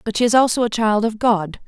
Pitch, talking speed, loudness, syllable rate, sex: 220 Hz, 285 wpm, -17 LUFS, 5.8 syllables/s, female